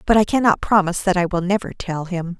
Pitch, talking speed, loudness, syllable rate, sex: 185 Hz, 250 wpm, -19 LUFS, 6.2 syllables/s, female